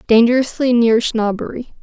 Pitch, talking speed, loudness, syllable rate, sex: 235 Hz, 100 wpm, -15 LUFS, 5.2 syllables/s, female